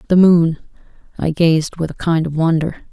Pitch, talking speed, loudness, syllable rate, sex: 165 Hz, 185 wpm, -16 LUFS, 5.3 syllables/s, female